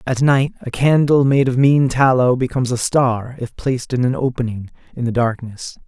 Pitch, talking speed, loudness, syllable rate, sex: 125 Hz, 195 wpm, -17 LUFS, 5.1 syllables/s, male